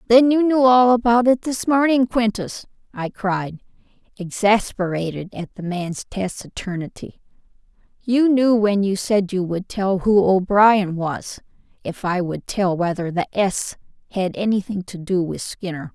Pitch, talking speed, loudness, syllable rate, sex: 205 Hz, 150 wpm, -20 LUFS, 4.2 syllables/s, female